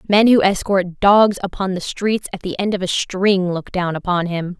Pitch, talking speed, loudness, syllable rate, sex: 190 Hz, 220 wpm, -18 LUFS, 4.7 syllables/s, female